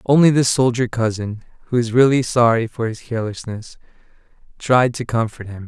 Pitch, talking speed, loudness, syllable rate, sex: 120 Hz, 160 wpm, -18 LUFS, 5.4 syllables/s, male